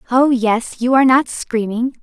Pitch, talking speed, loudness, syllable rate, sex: 245 Hz, 180 wpm, -16 LUFS, 4.6 syllables/s, female